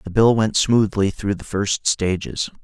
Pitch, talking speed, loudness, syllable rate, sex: 105 Hz, 185 wpm, -19 LUFS, 4.2 syllables/s, male